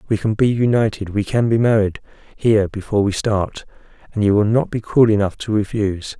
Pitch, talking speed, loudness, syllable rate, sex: 105 Hz, 175 wpm, -18 LUFS, 5.8 syllables/s, male